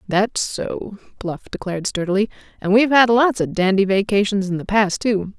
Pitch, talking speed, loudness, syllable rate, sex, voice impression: 205 Hz, 180 wpm, -19 LUFS, 5.1 syllables/s, female, feminine, slightly middle-aged, slightly powerful, slightly muffled, fluent, intellectual, calm, elegant, slightly strict, slightly sharp